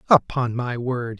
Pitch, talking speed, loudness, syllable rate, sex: 125 Hz, 150 wpm, -23 LUFS, 4.0 syllables/s, male